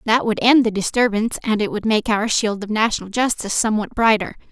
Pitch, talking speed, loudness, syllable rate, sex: 215 Hz, 215 wpm, -19 LUFS, 6.2 syllables/s, female